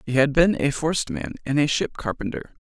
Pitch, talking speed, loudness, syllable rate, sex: 145 Hz, 230 wpm, -23 LUFS, 5.7 syllables/s, male